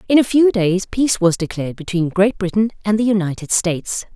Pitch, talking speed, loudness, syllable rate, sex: 195 Hz, 200 wpm, -17 LUFS, 5.8 syllables/s, female